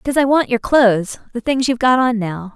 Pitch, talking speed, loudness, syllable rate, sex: 240 Hz, 235 wpm, -16 LUFS, 6.5 syllables/s, female